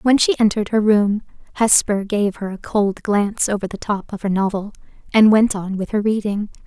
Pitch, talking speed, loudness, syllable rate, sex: 205 Hz, 205 wpm, -18 LUFS, 5.3 syllables/s, female